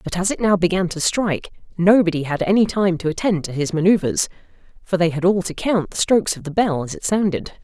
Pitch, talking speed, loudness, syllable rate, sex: 180 Hz, 235 wpm, -19 LUFS, 5.9 syllables/s, female